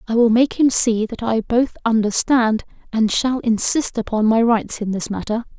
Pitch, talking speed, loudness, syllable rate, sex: 230 Hz, 195 wpm, -18 LUFS, 4.6 syllables/s, female